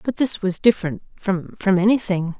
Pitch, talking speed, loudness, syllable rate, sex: 200 Hz, 150 wpm, -20 LUFS, 5.2 syllables/s, female